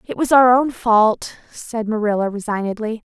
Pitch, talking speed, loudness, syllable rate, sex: 225 Hz, 155 wpm, -17 LUFS, 4.6 syllables/s, female